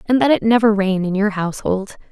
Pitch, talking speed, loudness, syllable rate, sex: 210 Hz, 225 wpm, -17 LUFS, 5.9 syllables/s, female